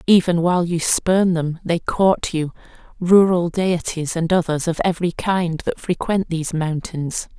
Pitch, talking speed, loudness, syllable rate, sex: 170 Hz, 145 wpm, -19 LUFS, 4.4 syllables/s, female